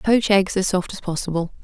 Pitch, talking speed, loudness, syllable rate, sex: 190 Hz, 220 wpm, -21 LUFS, 5.3 syllables/s, female